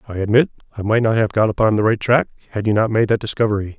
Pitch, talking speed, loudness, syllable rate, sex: 110 Hz, 270 wpm, -18 LUFS, 7.2 syllables/s, male